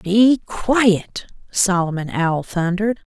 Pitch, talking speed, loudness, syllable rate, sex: 190 Hz, 95 wpm, -18 LUFS, 3.3 syllables/s, female